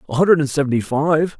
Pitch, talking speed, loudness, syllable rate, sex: 150 Hz, 215 wpm, -17 LUFS, 6.6 syllables/s, male